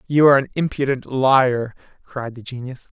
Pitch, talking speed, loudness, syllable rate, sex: 130 Hz, 160 wpm, -19 LUFS, 4.9 syllables/s, male